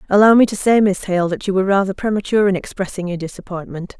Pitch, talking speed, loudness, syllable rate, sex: 195 Hz, 225 wpm, -17 LUFS, 6.9 syllables/s, female